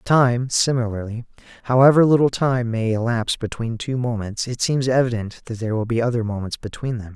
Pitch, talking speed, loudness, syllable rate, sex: 120 Hz, 185 wpm, -20 LUFS, 5.8 syllables/s, male